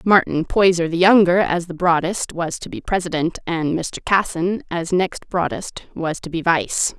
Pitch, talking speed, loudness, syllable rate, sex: 175 Hz, 180 wpm, -19 LUFS, 4.4 syllables/s, female